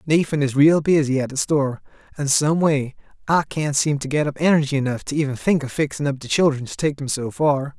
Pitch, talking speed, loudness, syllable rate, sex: 145 Hz, 240 wpm, -20 LUFS, 5.7 syllables/s, male